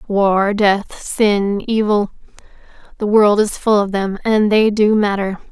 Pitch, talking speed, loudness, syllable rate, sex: 205 Hz, 140 wpm, -16 LUFS, 3.7 syllables/s, female